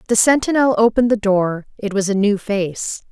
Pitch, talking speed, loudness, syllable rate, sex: 215 Hz, 190 wpm, -17 LUFS, 5.1 syllables/s, female